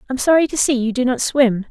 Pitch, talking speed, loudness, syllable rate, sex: 255 Hz, 280 wpm, -17 LUFS, 6.0 syllables/s, female